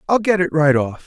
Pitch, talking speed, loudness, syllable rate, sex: 160 Hz, 280 wpm, -17 LUFS, 5.5 syllables/s, male